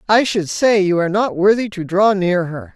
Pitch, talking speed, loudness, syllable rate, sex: 195 Hz, 240 wpm, -16 LUFS, 5.1 syllables/s, female